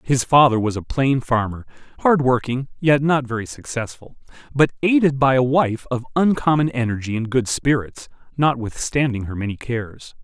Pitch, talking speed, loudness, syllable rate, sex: 130 Hz, 150 wpm, -19 LUFS, 5.0 syllables/s, male